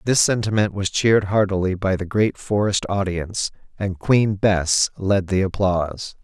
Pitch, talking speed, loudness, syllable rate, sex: 100 Hz, 155 wpm, -20 LUFS, 4.6 syllables/s, male